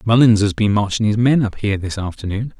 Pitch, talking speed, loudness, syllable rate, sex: 105 Hz, 230 wpm, -17 LUFS, 6.1 syllables/s, male